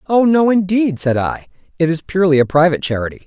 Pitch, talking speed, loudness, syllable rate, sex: 170 Hz, 200 wpm, -15 LUFS, 6.5 syllables/s, male